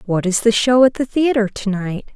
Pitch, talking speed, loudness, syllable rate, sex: 225 Hz, 250 wpm, -17 LUFS, 5.0 syllables/s, female